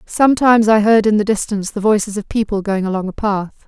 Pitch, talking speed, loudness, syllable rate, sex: 210 Hz, 230 wpm, -15 LUFS, 6.2 syllables/s, female